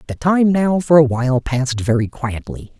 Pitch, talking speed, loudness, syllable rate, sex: 140 Hz, 195 wpm, -16 LUFS, 5.0 syllables/s, male